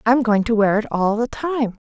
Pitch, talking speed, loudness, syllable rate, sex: 225 Hz, 255 wpm, -19 LUFS, 4.9 syllables/s, female